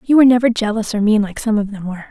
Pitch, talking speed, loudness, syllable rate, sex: 220 Hz, 315 wpm, -16 LUFS, 7.7 syllables/s, female